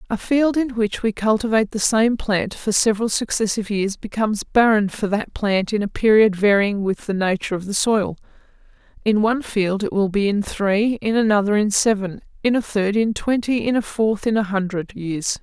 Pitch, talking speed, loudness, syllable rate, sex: 210 Hz, 200 wpm, -20 LUFS, 5.2 syllables/s, female